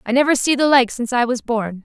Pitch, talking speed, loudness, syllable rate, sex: 245 Hz, 295 wpm, -17 LUFS, 6.4 syllables/s, female